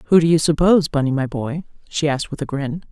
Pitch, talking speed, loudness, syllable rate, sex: 150 Hz, 245 wpm, -19 LUFS, 6.2 syllables/s, female